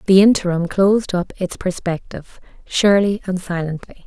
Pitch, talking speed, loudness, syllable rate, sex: 185 Hz, 135 wpm, -18 LUFS, 5.3 syllables/s, female